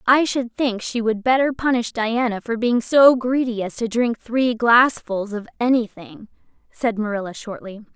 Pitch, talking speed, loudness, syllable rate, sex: 230 Hz, 165 wpm, -20 LUFS, 4.5 syllables/s, female